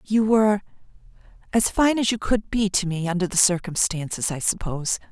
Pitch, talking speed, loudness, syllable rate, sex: 195 Hz, 165 wpm, -22 LUFS, 5.5 syllables/s, female